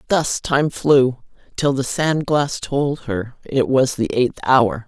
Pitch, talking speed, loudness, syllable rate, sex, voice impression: 135 Hz, 170 wpm, -19 LUFS, 3.3 syllables/s, female, very feminine, very adult-like, very middle-aged, slightly thin, tensed, very powerful, bright, hard, very clear, fluent, cool, slightly intellectual, slightly sincere, slightly calm, slightly friendly, slightly reassuring, unique, very wild, very lively, intense, slightly sharp